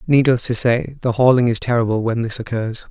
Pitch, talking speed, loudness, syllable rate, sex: 120 Hz, 205 wpm, -18 LUFS, 5.6 syllables/s, male